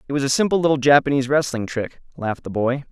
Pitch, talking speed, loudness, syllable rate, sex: 135 Hz, 225 wpm, -20 LUFS, 7.1 syllables/s, male